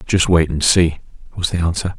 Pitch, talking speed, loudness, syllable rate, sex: 85 Hz, 210 wpm, -16 LUFS, 5.3 syllables/s, male